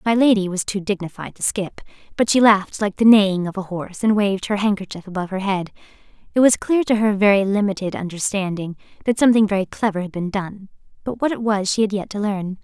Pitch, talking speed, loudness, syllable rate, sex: 200 Hz, 225 wpm, -19 LUFS, 6.2 syllables/s, female